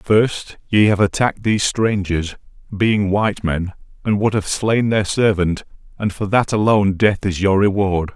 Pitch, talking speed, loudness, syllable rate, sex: 100 Hz, 170 wpm, -18 LUFS, 4.6 syllables/s, male